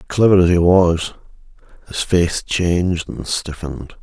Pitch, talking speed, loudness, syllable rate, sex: 85 Hz, 135 wpm, -17 LUFS, 4.1 syllables/s, male